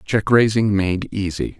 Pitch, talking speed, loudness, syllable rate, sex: 105 Hz, 150 wpm, -18 LUFS, 4.1 syllables/s, male